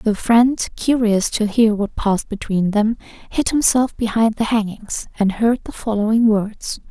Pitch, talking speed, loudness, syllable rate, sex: 220 Hz, 165 wpm, -18 LUFS, 4.3 syllables/s, female